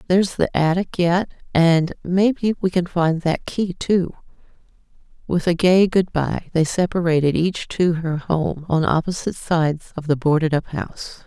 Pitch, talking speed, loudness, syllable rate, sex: 170 Hz, 165 wpm, -20 LUFS, 4.6 syllables/s, female